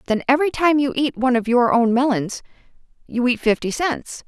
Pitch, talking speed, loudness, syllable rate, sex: 255 Hz, 195 wpm, -19 LUFS, 5.6 syllables/s, female